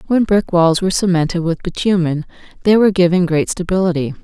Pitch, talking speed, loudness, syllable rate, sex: 180 Hz, 170 wpm, -15 LUFS, 6.1 syllables/s, female